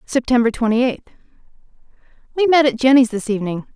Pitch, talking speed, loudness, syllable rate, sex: 245 Hz, 130 wpm, -16 LUFS, 6.5 syllables/s, female